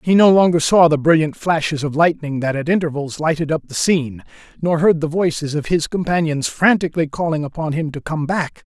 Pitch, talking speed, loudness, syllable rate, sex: 160 Hz, 205 wpm, -17 LUFS, 5.6 syllables/s, male